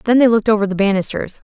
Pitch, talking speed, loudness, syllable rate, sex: 210 Hz, 240 wpm, -16 LUFS, 7.7 syllables/s, female